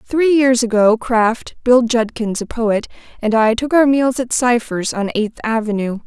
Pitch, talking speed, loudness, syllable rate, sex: 235 Hz, 180 wpm, -16 LUFS, 4.4 syllables/s, female